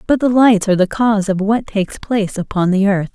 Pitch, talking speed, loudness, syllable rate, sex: 205 Hz, 250 wpm, -15 LUFS, 6.0 syllables/s, female